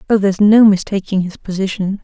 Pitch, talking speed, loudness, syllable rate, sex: 195 Hz, 175 wpm, -14 LUFS, 6.0 syllables/s, female